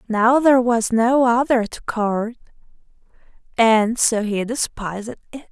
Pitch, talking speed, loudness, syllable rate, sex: 230 Hz, 130 wpm, -18 LUFS, 4.1 syllables/s, female